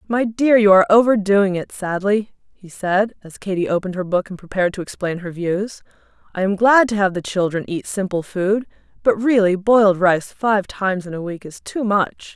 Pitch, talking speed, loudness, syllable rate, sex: 195 Hz, 200 wpm, -18 LUFS, 5.2 syllables/s, female